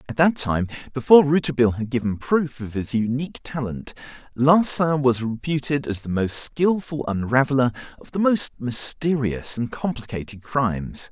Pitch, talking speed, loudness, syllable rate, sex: 130 Hz, 145 wpm, -22 LUFS, 5.1 syllables/s, male